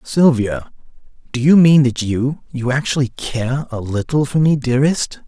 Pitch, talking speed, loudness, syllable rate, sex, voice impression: 130 Hz, 150 wpm, -16 LUFS, 4.5 syllables/s, male, masculine, middle-aged, thick, relaxed, powerful, soft, raspy, intellectual, slightly mature, friendly, wild, lively, slightly strict, slightly sharp